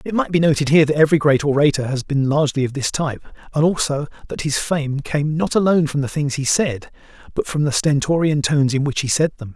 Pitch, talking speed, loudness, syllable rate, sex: 145 Hz, 240 wpm, -18 LUFS, 6.3 syllables/s, male